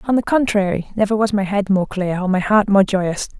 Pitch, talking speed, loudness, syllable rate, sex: 200 Hz, 250 wpm, -18 LUFS, 5.5 syllables/s, female